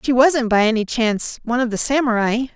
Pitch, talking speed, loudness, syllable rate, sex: 240 Hz, 210 wpm, -18 LUFS, 5.9 syllables/s, female